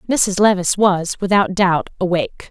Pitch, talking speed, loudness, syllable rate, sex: 190 Hz, 145 wpm, -16 LUFS, 5.0 syllables/s, female